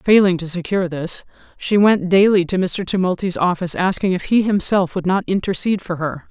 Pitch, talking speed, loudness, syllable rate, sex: 185 Hz, 190 wpm, -18 LUFS, 5.6 syllables/s, female